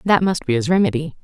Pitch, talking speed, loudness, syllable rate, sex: 185 Hz, 245 wpm, -18 LUFS, 6.4 syllables/s, female